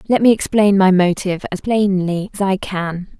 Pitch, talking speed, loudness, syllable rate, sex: 190 Hz, 190 wpm, -16 LUFS, 4.9 syllables/s, female